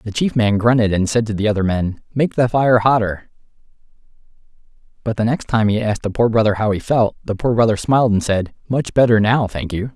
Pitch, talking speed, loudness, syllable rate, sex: 110 Hz, 225 wpm, -17 LUFS, 5.8 syllables/s, male